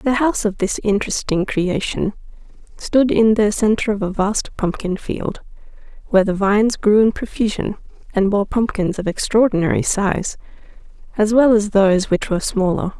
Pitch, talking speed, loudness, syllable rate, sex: 210 Hz, 155 wpm, -18 LUFS, 5.1 syllables/s, female